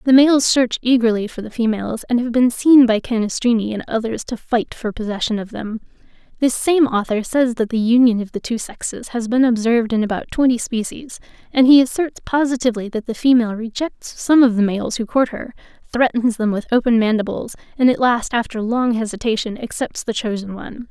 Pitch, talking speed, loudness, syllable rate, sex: 235 Hz, 200 wpm, -18 LUFS, 5.5 syllables/s, female